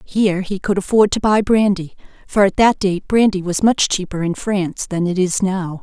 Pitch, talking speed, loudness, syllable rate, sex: 195 Hz, 215 wpm, -17 LUFS, 5.0 syllables/s, female